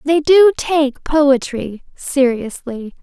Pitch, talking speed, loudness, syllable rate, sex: 275 Hz, 100 wpm, -15 LUFS, 2.9 syllables/s, female